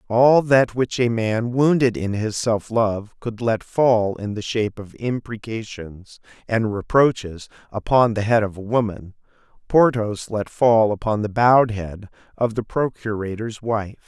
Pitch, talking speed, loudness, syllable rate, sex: 110 Hz, 160 wpm, -20 LUFS, 4.2 syllables/s, male